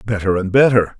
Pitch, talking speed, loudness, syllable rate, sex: 105 Hz, 180 wpm, -15 LUFS, 5.8 syllables/s, male